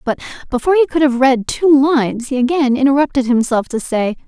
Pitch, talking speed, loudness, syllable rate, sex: 265 Hz, 195 wpm, -15 LUFS, 5.8 syllables/s, female